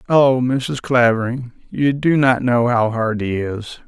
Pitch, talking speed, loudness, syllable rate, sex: 120 Hz, 170 wpm, -17 LUFS, 3.8 syllables/s, male